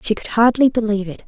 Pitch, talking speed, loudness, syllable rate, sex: 220 Hz, 235 wpm, -17 LUFS, 6.8 syllables/s, female